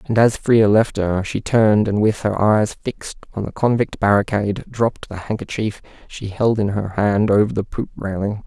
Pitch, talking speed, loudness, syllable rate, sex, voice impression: 105 Hz, 200 wpm, -19 LUFS, 5.1 syllables/s, male, masculine, adult-like, relaxed, soft, slightly muffled, slightly raspy, calm, friendly, slightly reassuring, unique, lively, kind